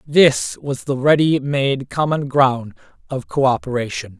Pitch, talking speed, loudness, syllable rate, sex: 135 Hz, 130 wpm, -18 LUFS, 3.8 syllables/s, male